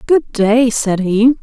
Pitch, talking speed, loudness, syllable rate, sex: 235 Hz, 170 wpm, -14 LUFS, 3.2 syllables/s, female